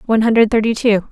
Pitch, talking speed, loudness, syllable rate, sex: 220 Hz, 215 wpm, -14 LUFS, 7.2 syllables/s, female